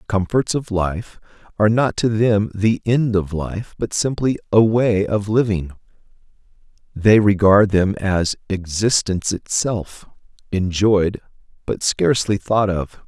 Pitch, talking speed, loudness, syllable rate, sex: 105 Hz, 130 wpm, -18 LUFS, 4.1 syllables/s, male